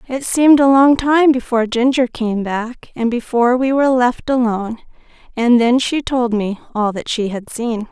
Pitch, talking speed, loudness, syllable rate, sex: 245 Hz, 190 wpm, -15 LUFS, 4.8 syllables/s, female